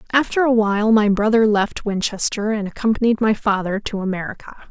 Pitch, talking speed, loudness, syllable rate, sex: 215 Hz, 165 wpm, -19 LUFS, 5.8 syllables/s, female